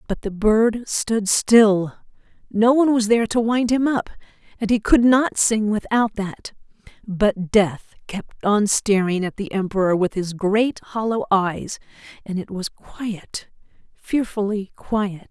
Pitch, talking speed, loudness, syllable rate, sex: 210 Hz, 150 wpm, -20 LUFS, 3.8 syllables/s, female